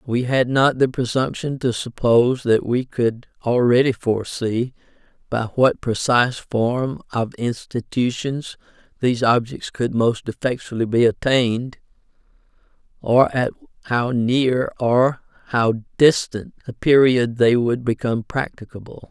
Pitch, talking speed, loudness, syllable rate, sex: 120 Hz, 120 wpm, -20 LUFS, 4.2 syllables/s, male